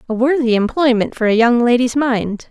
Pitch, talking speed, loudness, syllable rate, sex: 240 Hz, 190 wpm, -15 LUFS, 5.2 syllables/s, female